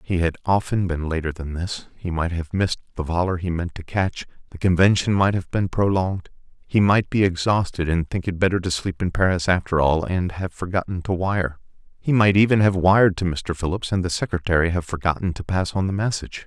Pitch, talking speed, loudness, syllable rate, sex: 90 Hz, 220 wpm, -22 LUFS, 5.7 syllables/s, male